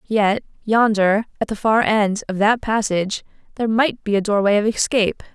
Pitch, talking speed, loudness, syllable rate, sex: 210 Hz, 180 wpm, -19 LUFS, 5.2 syllables/s, female